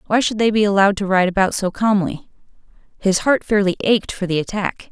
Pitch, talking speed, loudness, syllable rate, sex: 200 Hz, 210 wpm, -18 LUFS, 5.8 syllables/s, female